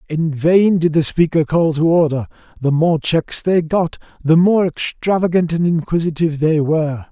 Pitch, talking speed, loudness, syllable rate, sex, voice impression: 160 Hz, 170 wpm, -16 LUFS, 4.8 syllables/s, male, masculine, middle-aged, slightly tensed, powerful, hard, slightly muffled, raspy, intellectual, mature, wild, lively, slightly strict